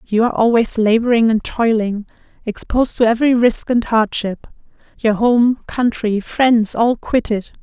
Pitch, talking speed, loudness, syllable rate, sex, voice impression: 230 Hz, 140 wpm, -16 LUFS, 4.5 syllables/s, female, feminine, adult-like, tensed, powerful, slightly bright, clear, intellectual, calm, friendly, reassuring, lively, slightly sharp